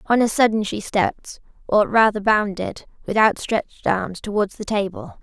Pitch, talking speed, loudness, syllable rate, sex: 210 Hz, 160 wpm, -20 LUFS, 4.7 syllables/s, female